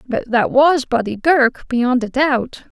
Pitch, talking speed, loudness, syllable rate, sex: 255 Hz, 170 wpm, -16 LUFS, 3.7 syllables/s, female